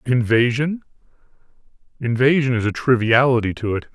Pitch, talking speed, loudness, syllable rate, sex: 125 Hz, 105 wpm, -18 LUFS, 5.3 syllables/s, male